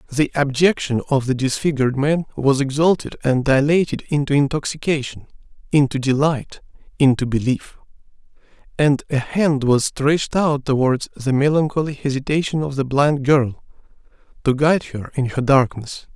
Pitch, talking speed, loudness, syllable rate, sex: 140 Hz, 135 wpm, -19 LUFS, 5.0 syllables/s, male